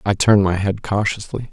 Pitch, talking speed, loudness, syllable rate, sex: 100 Hz, 195 wpm, -18 LUFS, 5.7 syllables/s, male